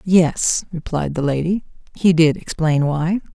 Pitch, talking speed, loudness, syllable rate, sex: 165 Hz, 145 wpm, -18 LUFS, 4.0 syllables/s, female